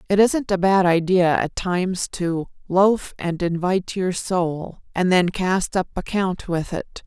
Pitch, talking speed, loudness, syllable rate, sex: 180 Hz, 170 wpm, -21 LUFS, 3.9 syllables/s, female